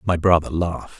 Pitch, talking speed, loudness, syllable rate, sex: 85 Hz, 180 wpm, -20 LUFS, 5.8 syllables/s, male